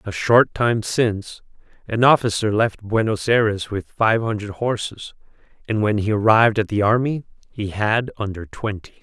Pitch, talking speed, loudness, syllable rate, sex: 110 Hz, 160 wpm, -20 LUFS, 4.8 syllables/s, male